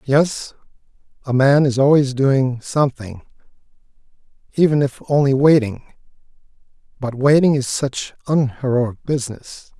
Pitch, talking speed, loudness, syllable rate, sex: 135 Hz, 105 wpm, -17 LUFS, 4.4 syllables/s, male